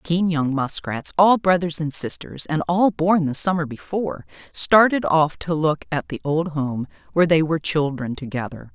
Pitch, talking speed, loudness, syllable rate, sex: 160 Hz, 180 wpm, -21 LUFS, 4.9 syllables/s, female